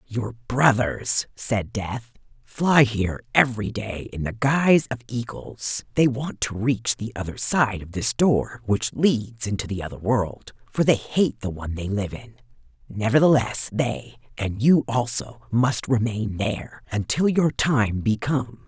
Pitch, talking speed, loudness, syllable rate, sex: 115 Hz, 160 wpm, -23 LUFS, 4.1 syllables/s, female